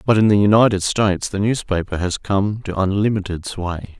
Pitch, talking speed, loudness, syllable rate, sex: 100 Hz, 180 wpm, -18 LUFS, 5.3 syllables/s, male